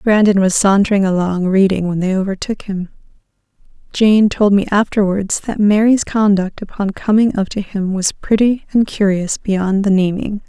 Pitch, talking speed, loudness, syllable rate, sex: 200 Hz, 160 wpm, -15 LUFS, 4.7 syllables/s, female